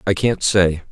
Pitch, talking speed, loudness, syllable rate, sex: 95 Hz, 195 wpm, -17 LUFS, 4.1 syllables/s, male